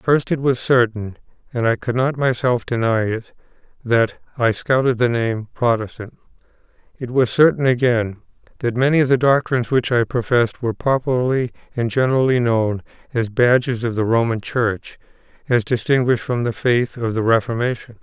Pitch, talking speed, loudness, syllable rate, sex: 120 Hz, 160 wpm, -19 LUFS, 5.1 syllables/s, male